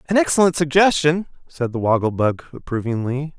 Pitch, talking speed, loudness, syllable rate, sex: 145 Hz, 140 wpm, -19 LUFS, 5.5 syllables/s, male